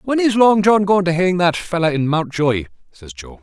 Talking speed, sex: 230 wpm, male